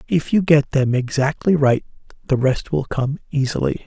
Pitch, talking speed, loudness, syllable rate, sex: 140 Hz, 170 wpm, -19 LUFS, 4.9 syllables/s, male